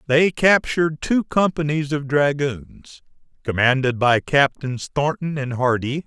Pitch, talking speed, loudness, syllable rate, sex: 145 Hz, 120 wpm, -20 LUFS, 4.0 syllables/s, male